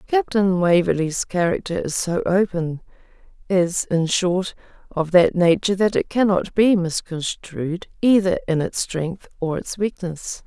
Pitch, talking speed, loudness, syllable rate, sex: 180 Hz, 130 wpm, -20 LUFS, 4.2 syllables/s, female